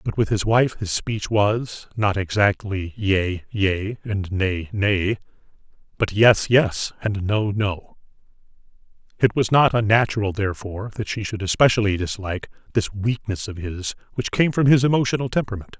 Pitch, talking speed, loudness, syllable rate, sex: 105 Hz, 145 wpm, -21 LUFS, 4.6 syllables/s, male